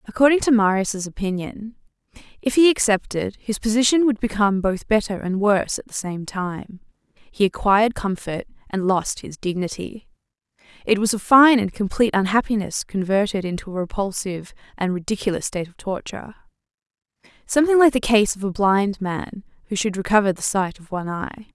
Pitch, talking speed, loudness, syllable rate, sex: 205 Hz, 160 wpm, -21 LUFS, 5.5 syllables/s, female